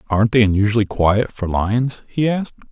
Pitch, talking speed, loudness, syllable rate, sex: 110 Hz, 175 wpm, -18 LUFS, 5.7 syllables/s, male